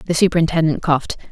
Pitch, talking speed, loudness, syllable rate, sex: 160 Hz, 135 wpm, -17 LUFS, 7.8 syllables/s, female